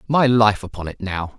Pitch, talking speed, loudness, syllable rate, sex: 110 Hz, 215 wpm, -19 LUFS, 5.0 syllables/s, male